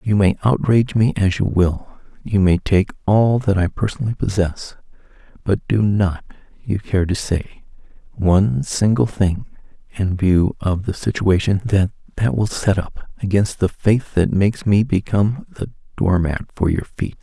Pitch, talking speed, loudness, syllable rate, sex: 100 Hz, 160 wpm, -18 LUFS, 4.5 syllables/s, male